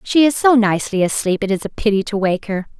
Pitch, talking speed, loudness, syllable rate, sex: 210 Hz, 260 wpm, -17 LUFS, 6.1 syllables/s, female